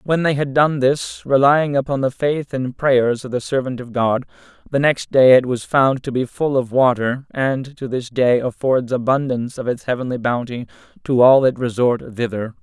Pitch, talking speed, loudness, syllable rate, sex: 130 Hz, 200 wpm, -18 LUFS, 4.8 syllables/s, male